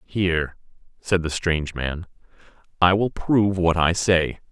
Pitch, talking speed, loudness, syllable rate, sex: 90 Hz, 145 wpm, -21 LUFS, 4.4 syllables/s, male